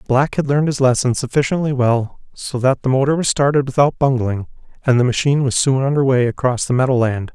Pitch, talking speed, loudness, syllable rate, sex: 130 Hz, 215 wpm, -17 LUFS, 6.2 syllables/s, male